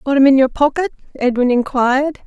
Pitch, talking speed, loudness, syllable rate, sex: 270 Hz, 185 wpm, -15 LUFS, 6.0 syllables/s, female